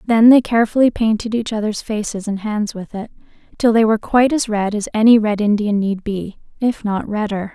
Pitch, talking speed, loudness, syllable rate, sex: 215 Hz, 205 wpm, -17 LUFS, 5.5 syllables/s, female